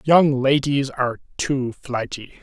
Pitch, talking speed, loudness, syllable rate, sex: 135 Hz, 125 wpm, -21 LUFS, 3.9 syllables/s, male